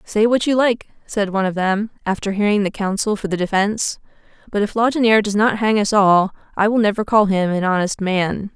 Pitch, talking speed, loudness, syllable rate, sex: 205 Hz, 215 wpm, -18 LUFS, 5.7 syllables/s, female